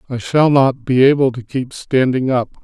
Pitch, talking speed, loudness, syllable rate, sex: 130 Hz, 205 wpm, -15 LUFS, 4.7 syllables/s, male